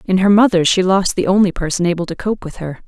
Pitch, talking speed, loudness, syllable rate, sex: 185 Hz, 270 wpm, -15 LUFS, 6.2 syllables/s, female